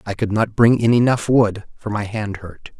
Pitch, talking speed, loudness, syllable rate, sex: 110 Hz, 235 wpm, -18 LUFS, 4.7 syllables/s, male